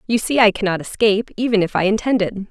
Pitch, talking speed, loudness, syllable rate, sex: 210 Hz, 215 wpm, -18 LUFS, 6.6 syllables/s, female